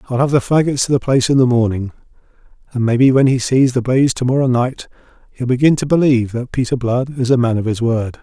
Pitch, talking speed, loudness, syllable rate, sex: 125 Hz, 240 wpm, -15 LUFS, 6.2 syllables/s, male